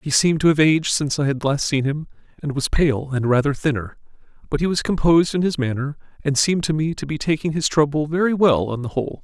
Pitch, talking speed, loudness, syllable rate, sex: 145 Hz, 245 wpm, -20 LUFS, 6.4 syllables/s, male